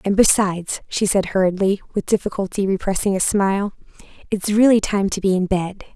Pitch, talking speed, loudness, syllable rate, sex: 195 Hz, 170 wpm, -19 LUFS, 5.6 syllables/s, female